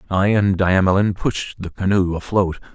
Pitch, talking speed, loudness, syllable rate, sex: 95 Hz, 155 wpm, -19 LUFS, 4.6 syllables/s, male